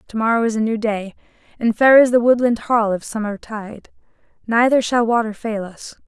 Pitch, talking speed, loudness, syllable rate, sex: 225 Hz, 200 wpm, -17 LUFS, 5.1 syllables/s, female